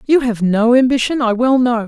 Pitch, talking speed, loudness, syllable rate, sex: 240 Hz, 225 wpm, -14 LUFS, 5.3 syllables/s, female